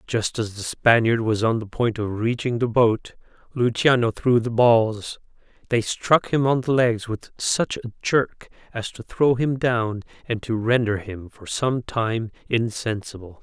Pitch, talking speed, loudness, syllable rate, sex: 115 Hz, 175 wpm, -22 LUFS, 4.0 syllables/s, male